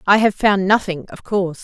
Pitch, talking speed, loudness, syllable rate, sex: 195 Hz, 220 wpm, -17 LUFS, 5.5 syllables/s, female